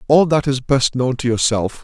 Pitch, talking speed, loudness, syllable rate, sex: 130 Hz, 230 wpm, -17 LUFS, 4.9 syllables/s, male